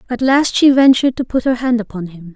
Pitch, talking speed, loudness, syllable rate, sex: 240 Hz, 255 wpm, -14 LUFS, 6.1 syllables/s, female